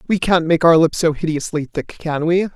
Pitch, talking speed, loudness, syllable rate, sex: 165 Hz, 235 wpm, -17 LUFS, 5.2 syllables/s, male